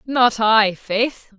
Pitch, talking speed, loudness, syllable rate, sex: 225 Hz, 130 wpm, -17 LUFS, 2.4 syllables/s, female